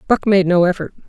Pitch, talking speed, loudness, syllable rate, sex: 185 Hz, 220 wpm, -15 LUFS, 6.2 syllables/s, female